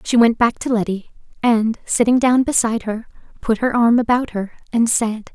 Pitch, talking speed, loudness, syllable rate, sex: 230 Hz, 190 wpm, -18 LUFS, 5.0 syllables/s, female